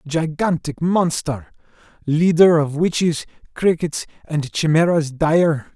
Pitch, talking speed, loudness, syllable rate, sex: 160 Hz, 95 wpm, -19 LUFS, 3.8 syllables/s, male